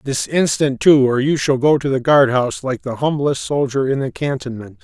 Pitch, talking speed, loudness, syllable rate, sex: 135 Hz, 225 wpm, -17 LUFS, 5.1 syllables/s, male